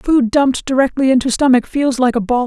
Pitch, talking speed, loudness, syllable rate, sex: 260 Hz, 220 wpm, -14 LUFS, 5.7 syllables/s, female